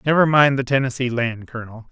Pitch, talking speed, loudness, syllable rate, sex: 130 Hz, 190 wpm, -18 LUFS, 6.2 syllables/s, male